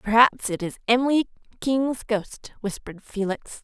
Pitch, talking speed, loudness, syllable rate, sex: 225 Hz, 130 wpm, -24 LUFS, 4.8 syllables/s, female